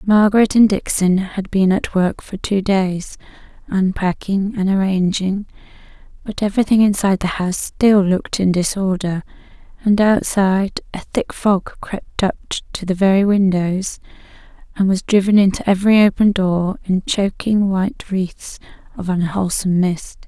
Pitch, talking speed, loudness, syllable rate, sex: 195 Hz, 140 wpm, -17 LUFS, 4.7 syllables/s, female